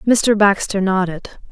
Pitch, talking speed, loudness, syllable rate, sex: 200 Hz, 120 wpm, -16 LUFS, 4.0 syllables/s, female